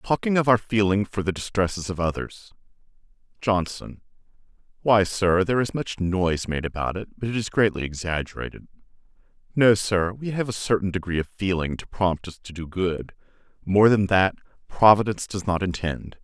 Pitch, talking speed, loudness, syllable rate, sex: 95 Hz, 165 wpm, -23 LUFS, 5.2 syllables/s, male